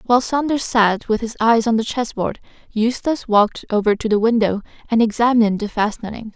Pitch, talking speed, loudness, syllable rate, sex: 225 Hz, 180 wpm, -18 LUFS, 5.8 syllables/s, female